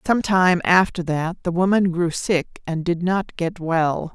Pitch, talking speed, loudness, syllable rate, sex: 175 Hz, 190 wpm, -20 LUFS, 3.9 syllables/s, female